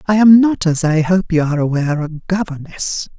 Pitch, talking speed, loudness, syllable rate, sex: 170 Hz, 205 wpm, -15 LUFS, 5.4 syllables/s, female